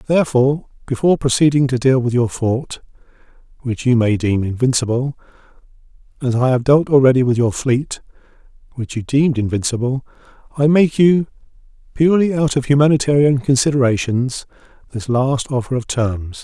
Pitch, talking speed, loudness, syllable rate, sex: 130 Hz, 140 wpm, -16 LUFS, 5.5 syllables/s, male